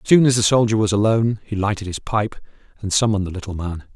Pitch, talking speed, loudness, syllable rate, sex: 105 Hz, 245 wpm, -19 LUFS, 6.9 syllables/s, male